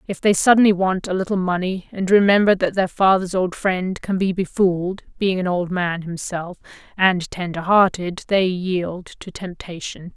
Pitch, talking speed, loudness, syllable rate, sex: 185 Hz, 170 wpm, -19 LUFS, 4.7 syllables/s, female